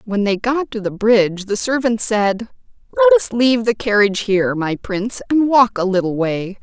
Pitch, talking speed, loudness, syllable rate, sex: 220 Hz, 200 wpm, -17 LUFS, 5.3 syllables/s, female